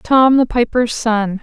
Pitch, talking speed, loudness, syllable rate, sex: 235 Hz, 170 wpm, -14 LUFS, 3.8 syllables/s, female